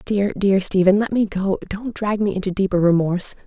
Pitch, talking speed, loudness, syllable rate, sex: 195 Hz, 190 wpm, -19 LUFS, 5.5 syllables/s, female